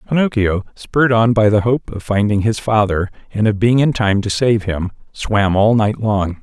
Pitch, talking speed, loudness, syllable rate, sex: 110 Hz, 205 wpm, -16 LUFS, 4.7 syllables/s, male